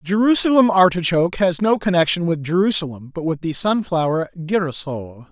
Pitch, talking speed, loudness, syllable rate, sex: 175 Hz, 135 wpm, -18 LUFS, 5.5 syllables/s, male